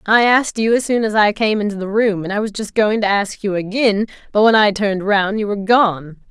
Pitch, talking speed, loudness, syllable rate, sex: 210 Hz, 265 wpm, -16 LUFS, 5.6 syllables/s, female